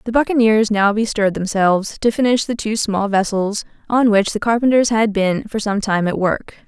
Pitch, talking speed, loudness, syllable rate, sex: 215 Hz, 200 wpm, -17 LUFS, 5.2 syllables/s, female